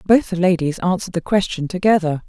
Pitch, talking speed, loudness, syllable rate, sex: 180 Hz, 185 wpm, -18 LUFS, 6.2 syllables/s, female